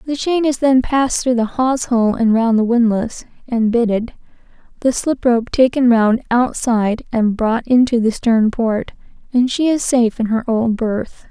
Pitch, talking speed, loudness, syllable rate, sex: 235 Hz, 185 wpm, -16 LUFS, 4.6 syllables/s, female